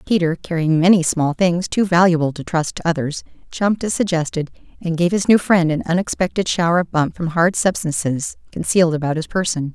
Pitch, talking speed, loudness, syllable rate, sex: 170 Hz, 190 wpm, -18 LUFS, 5.7 syllables/s, female